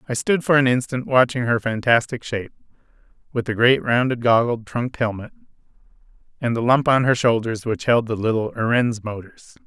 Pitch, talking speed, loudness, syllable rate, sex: 120 Hz, 175 wpm, -20 LUFS, 5.4 syllables/s, male